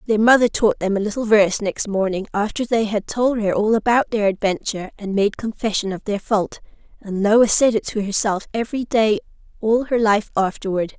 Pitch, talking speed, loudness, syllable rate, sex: 210 Hz, 195 wpm, -19 LUFS, 5.4 syllables/s, female